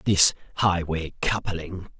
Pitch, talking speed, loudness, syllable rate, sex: 90 Hz, 90 wpm, -24 LUFS, 3.5 syllables/s, male